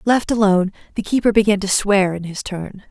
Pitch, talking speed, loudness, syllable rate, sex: 200 Hz, 205 wpm, -18 LUFS, 5.5 syllables/s, female